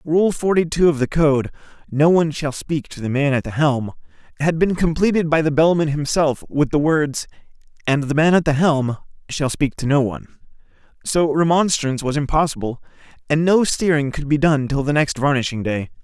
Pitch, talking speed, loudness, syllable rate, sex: 150 Hz, 195 wpm, -19 LUFS, 5.3 syllables/s, male